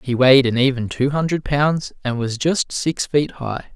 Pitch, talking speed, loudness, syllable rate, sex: 135 Hz, 210 wpm, -19 LUFS, 4.6 syllables/s, male